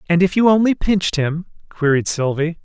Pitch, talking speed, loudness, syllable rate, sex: 170 Hz, 180 wpm, -17 LUFS, 5.4 syllables/s, male